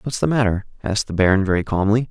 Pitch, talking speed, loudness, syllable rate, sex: 105 Hz, 230 wpm, -19 LUFS, 7.1 syllables/s, male